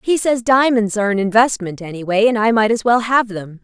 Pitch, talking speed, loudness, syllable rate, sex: 220 Hz, 230 wpm, -16 LUFS, 5.7 syllables/s, female